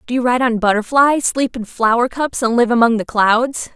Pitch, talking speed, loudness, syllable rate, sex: 240 Hz, 225 wpm, -15 LUFS, 5.0 syllables/s, female